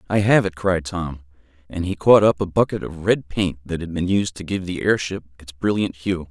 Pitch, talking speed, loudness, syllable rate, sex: 90 Hz, 240 wpm, -21 LUFS, 5.2 syllables/s, male